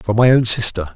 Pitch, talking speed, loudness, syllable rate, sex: 110 Hz, 250 wpm, -14 LUFS, 5.9 syllables/s, male